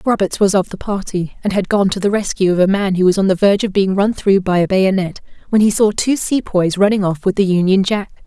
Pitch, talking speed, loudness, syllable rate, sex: 195 Hz, 270 wpm, -15 LUFS, 5.9 syllables/s, female